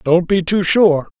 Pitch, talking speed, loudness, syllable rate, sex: 180 Hz, 200 wpm, -14 LUFS, 4.0 syllables/s, female